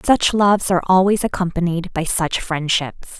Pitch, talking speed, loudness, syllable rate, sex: 180 Hz, 150 wpm, -18 LUFS, 5.1 syllables/s, female